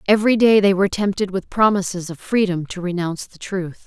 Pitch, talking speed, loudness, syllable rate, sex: 190 Hz, 200 wpm, -19 LUFS, 5.9 syllables/s, female